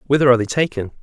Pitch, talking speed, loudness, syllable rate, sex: 125 Hz, 235 wpm, -17 LUFS, 9.0 syllables/s, male